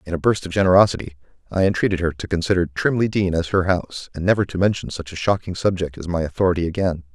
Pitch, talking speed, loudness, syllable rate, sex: 90 Hz, 225 wpm, -20 LUFS, 6.9 syllables/s, male